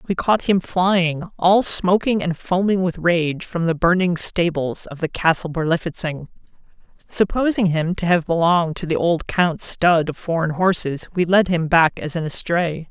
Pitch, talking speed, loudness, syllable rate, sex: 170 Hz, 175 wpm, -19 LUFS, 4.5 syllables/s, female